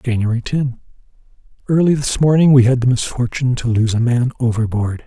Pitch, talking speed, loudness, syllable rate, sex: 125 Hz, 155 wpm, -16 LUFS, 5.7 syllables/s, male